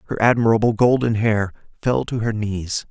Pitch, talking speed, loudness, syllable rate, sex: 110 Hz, 165 wpm, -19 LUFS, 5.0 syllables/s, male